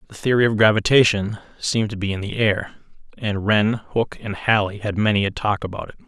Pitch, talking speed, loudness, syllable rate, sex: 105 Hz, 205 wpm, -20 LUFS, 6.0 syllables/s, male